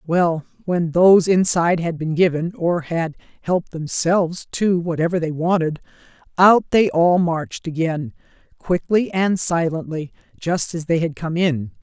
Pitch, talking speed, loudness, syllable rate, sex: 170 Hz, 145 wpm, -19 LUFS, 4.6 syllables/s, female